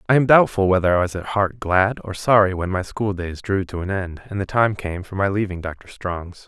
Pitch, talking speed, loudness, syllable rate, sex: 95 Hz, 260 wpm, -20 LUFS, 5.3 syllables/s, male